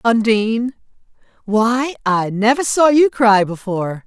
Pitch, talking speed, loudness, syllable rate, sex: 225 Hz, 105 wpm, -16 LUFS, 4.1 syllables/s, female